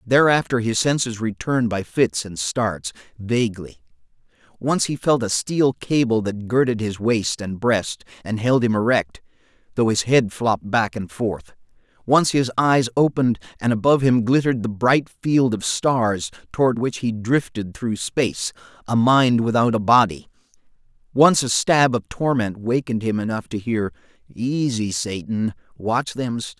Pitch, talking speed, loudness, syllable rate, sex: 115 Hz, 160 wpm, -20 LUFS, 4.6 syllables/s, male